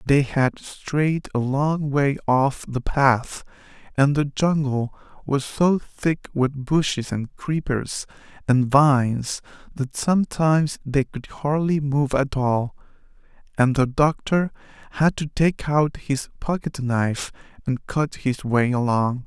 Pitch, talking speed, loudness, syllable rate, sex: 140 Hz, 135 wpm, -22 LUFS, 3.6 syllables/s, male